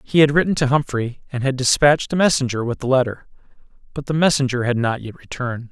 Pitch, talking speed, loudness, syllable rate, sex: 135 Hz, 210 wpm, -19 LUFS, 6.4 syllables/s, male